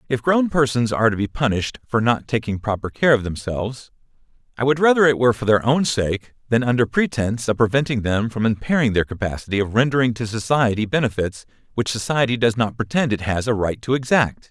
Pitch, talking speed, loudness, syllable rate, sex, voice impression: 120 Hz, 205 wpm, -20 LUFS, 6.0 syllables/s, male, masculine, adult-like, fluent, cool, slightly intellectual, refreshing, slightly friendly